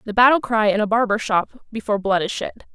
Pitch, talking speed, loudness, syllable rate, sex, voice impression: 215 Hz, 240 wpm, -19 LUFS, 6.4 syllables/s, female, very feminine, very adult-like, thin, tensed, slightly powerful, slightly bright, slightly hard, clear, fluent, very cool, very intellectual, very refreshing, very sincere, calm, very friendly, very reassuring, unique, very elegant, slightly wild, sweet, lively, slightly strict, slightly intense, light